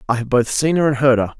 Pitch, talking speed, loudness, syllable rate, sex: 130 Hz, 300 wpm, -17 LUFS, 5.7 syllables/s, male